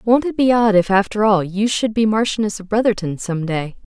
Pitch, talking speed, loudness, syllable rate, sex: 210 Hz, 230 wpm, -17 LUFS, 5.4 syllables/s, female